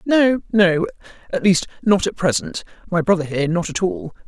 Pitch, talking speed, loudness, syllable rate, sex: 190 Hz, 170 wpm, -19 LUFS, 5.1 syllables/s, female